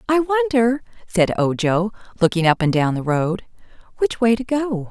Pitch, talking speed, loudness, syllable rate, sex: 215 Hz, 170 wpm, -19 LUFS, 4.6 syllables/s, female